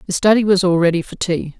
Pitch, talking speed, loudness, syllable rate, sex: 185 Hz, 265 wpm, -16 LUFS, 6.3 syllables/s, female